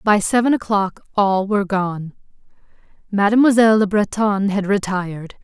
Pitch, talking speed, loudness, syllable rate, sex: 200 Hz, 120 wpm, -17 LUFS, 5.0 syllables/s, female